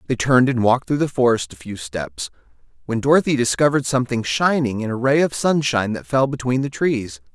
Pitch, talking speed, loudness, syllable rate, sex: 125 Hz, 205 wpm, -19 LUFS, 6.0 syllables/s, male